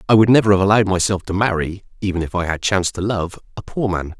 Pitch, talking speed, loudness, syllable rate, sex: 95 Hz, 255 wpm, -18 LUFS, 6.7 syllables/s, male